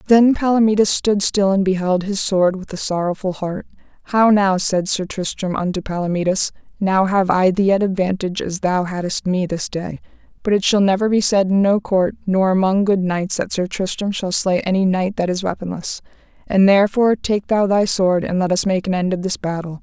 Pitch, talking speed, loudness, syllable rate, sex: 190 Hz, 210 wpm, -18 LUFS, 5.3 syllables/s, female